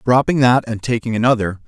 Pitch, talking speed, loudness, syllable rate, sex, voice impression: 120 Hz, 180 wpm, -16 LUFS, 5.8 syllables/s, male, masculine, adult-like, thick, tensed, powerful, fluent, intellectual, slightly mature, slightly unique, lively, slightly intense